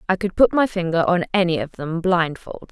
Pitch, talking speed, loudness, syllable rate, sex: 180 Hz, 245 wpm, -20 LUFS, 5.3 syllables/s, female